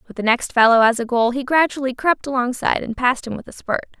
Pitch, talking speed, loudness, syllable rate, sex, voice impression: 250 Hz, 255 wpm, -18 LUFS, 6.5 syllables/s, female, very feminine, young, very thin, tensed, slightly powerful, very bright, slightly hard, very clear, very fluent, raspy, cute, slightly intellectual, very refreshing, sincere, slightly calm, very friendly, very reassuring, very unique, slightly elegant, wild, slightly sweet, very lively, slightly kind, intense, sharp, very light